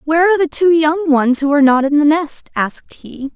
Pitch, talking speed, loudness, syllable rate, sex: 300 Hz, 250 wpm, -14 LUFS, 5.7 syllables/s, female